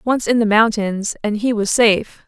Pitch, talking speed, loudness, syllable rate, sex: 220 Hz, 210 wpm, -17 LUFS, 4.8 syllables/s, female